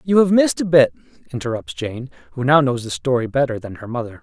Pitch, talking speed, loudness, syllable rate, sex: 130 Hz, 225 wpm, -19 LUFS, 6.3 syllables/s, male